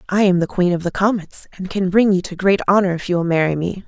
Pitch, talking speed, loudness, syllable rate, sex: 185 Hz, 295 wpm, -18 LUFS, 6.2 syllables/s, female